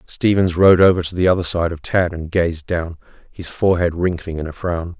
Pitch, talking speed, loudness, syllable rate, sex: 85 Hz, 215 wpm, -18 LUFS, 5.3 syllables/s, male